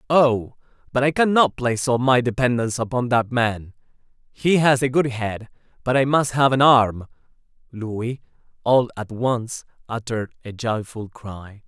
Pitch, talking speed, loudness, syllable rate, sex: 120 Hz, 155 wpm, -20 LUFS, 4.5 syllables/s, male